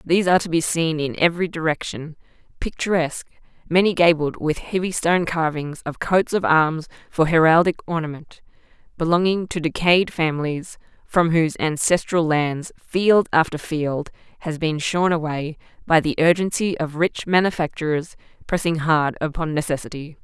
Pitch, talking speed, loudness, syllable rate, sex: 165 Hz, 140 wpm, -20 LUFS, 5.0 syllables/s, female